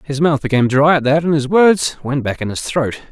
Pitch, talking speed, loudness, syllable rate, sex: 145 Hz, 270 wpm, -15 LUFS, 5.4 syllables/s, male